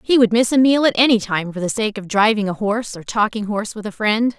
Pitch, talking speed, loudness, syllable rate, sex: 215 Hz, 290 wpm, -18 LUFS, 6.1 syllables/s, female